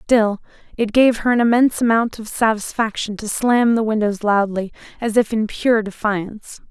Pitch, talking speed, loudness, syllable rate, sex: 220 Hz, 170 wpm, -18 LUFS, 4.9 syllables/s, female